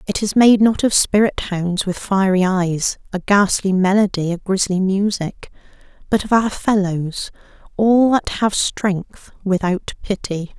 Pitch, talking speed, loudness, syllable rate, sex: 195 Hz, 140 wpm, -17 LUFS, 4.0 syllables/s, female